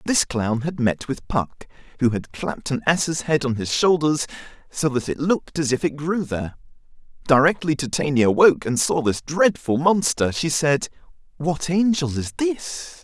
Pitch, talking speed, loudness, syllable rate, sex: 145 Hz, 175 wpm, -21 LUFS, 4.6 syllables/s, male